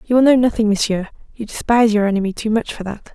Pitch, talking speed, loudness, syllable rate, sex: 220 Hz, 250 wpm, -17 LUFS, 6.8 syllables/s, female